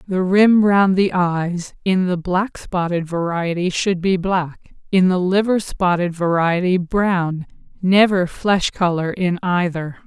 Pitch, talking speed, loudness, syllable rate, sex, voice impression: 180 Hz, 135 wpm, -18 LUFS, 3.7 syllables/s, female, feminine, adult-like, slightly cool, slightly intellectual, calm, reassuring